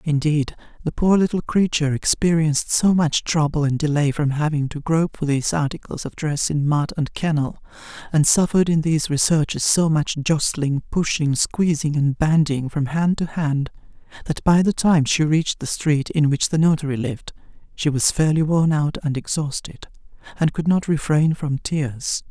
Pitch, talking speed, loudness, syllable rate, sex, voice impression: 155 Hz, 180 wpm, -20 LUFS, 4.9 syllables/s, male, slightly masculine, adult-like, slightly soft, slightly unique, kind